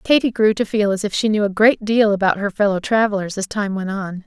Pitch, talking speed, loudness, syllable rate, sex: 205 Hz, 265 wpm, -18 LUFS, 5.8 syllables/s, female